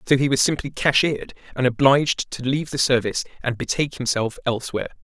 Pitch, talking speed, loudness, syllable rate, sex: 130 Hz, 175 wpm, -21 LUFS, 6.7 syllables/s, male